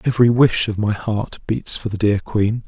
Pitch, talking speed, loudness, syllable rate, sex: 110 Hz, 225 wpm, -19 LUFS, 4.9 syllables/s, male